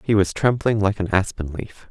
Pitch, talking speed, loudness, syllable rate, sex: 100 Hz, 220 wpm, -21 LUFS, 5.0 syllables/s, male